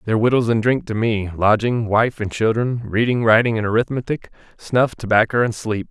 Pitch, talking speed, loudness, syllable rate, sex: 110 Hz, 150 wpm, -19 LUFS, 5.4 syllables/s, male